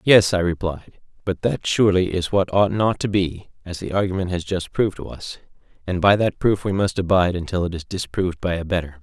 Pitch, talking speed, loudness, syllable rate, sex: 95 Hz, 225 wpm, -21 LUFS, 5.7 syllables/s, male